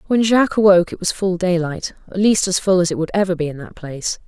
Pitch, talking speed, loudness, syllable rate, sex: 185 Hz, 255 wpm, -17 LUFS, 6.4 syllables/s, female